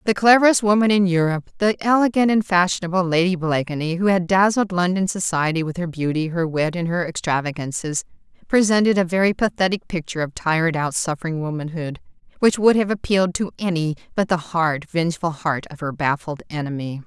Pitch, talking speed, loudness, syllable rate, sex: 175 Hz, 170 wpm, -20 LUFS, 5.9 syllables/s, female